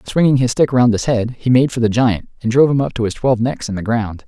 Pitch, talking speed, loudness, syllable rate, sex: 120 Hz, 325 wpm, -16 LUFS, 6.4 syllables/s, male